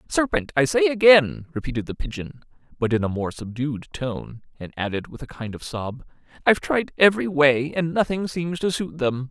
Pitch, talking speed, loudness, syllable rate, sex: 140 Hz, 195 wpm, -22 LUFS, 5.2 syllables/s, male